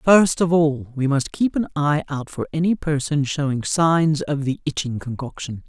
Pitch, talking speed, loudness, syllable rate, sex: 150 Hz, 190 wpm, -21 LUFS, 4.6 syllables/s, female